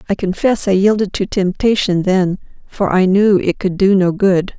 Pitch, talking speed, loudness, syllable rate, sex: 190 Hz, 195 wpm, -15 LUFS, 4.6 syllables/s, female